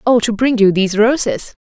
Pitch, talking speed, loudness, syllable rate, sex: 215 Hz, 210 wpm, -14 LUFS, 5.5 syllables/s, female